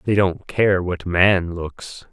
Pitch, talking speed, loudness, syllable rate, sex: 90 Hz, 170 wpm, -19 LUFS, 3.1 syllables/s, male